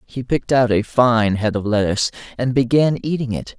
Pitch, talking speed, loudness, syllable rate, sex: 120 Hz, 200 wpm, -18 LUFS, 5.3 syllables/s, male